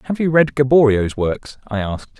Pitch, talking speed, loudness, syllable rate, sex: 125 Hz, 190 wpm, -17 LUFS, 5.2 syllables/s, male